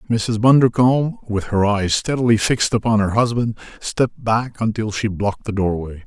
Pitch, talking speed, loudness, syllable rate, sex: 110 Hz, 170 wpm, -18 LUFS, 5.3 syllables/s, male